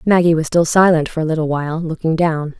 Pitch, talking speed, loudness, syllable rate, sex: 160 Hz, 230 wpm, -16 LUFS, 6.1 syllables/s, female